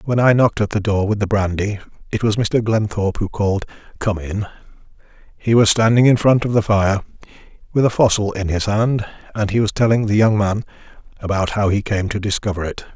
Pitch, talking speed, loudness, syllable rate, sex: 105 Hz, 210 wpm, -18 LUFS, 5.7 syllables/s, male